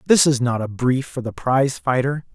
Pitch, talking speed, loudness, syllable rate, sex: 130 Hz, 230 wpm, -20 LUFS, 5.2 syllables/s, male